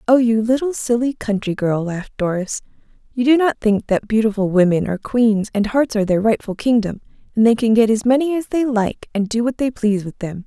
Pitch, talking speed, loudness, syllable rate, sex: 225 Hz, 225 wpm, -18 LUFS, 5.7 syllables/s, female